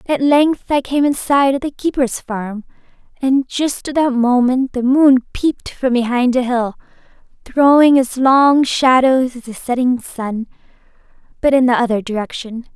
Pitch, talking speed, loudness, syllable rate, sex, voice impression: 255 Hz, 165 wpm, -15 LUFS, 4.3 syllables/s, female, feminine, young, tensed, powerful, bright, clear, slightly cute, friendly, lively, slightly light